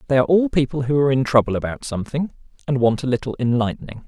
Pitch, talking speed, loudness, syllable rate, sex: 130 Hz, 220 wpm, -20 LUFS, 7.4 syllables/s, male